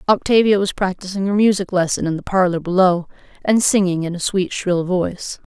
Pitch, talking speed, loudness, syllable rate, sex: 185 Hz, 185 wpm, -18 LUFS, 5.5 syllables/s, female